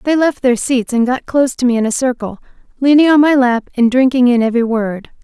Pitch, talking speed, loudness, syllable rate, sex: 250 Hz, 240 wpm, -13 LUFS, 5.9 syllables/s, female